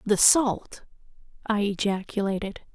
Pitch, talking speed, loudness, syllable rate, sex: 205 Hz, 85 wpm, -24 LUFS, 4.0 syllables/s, female